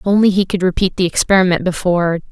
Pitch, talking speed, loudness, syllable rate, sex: 185 Hz, 205 wpm, -15 LUFS, 6.9 syllables/s, female